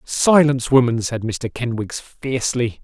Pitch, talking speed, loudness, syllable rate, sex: 125 Hz, 125 wpm, -19 LUFS, 4.4 syllables/s, male